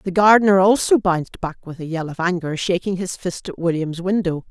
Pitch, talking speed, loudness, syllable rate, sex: 180 Hz, 215 wpm, -19 LUFS, 5.4 syllables/s, female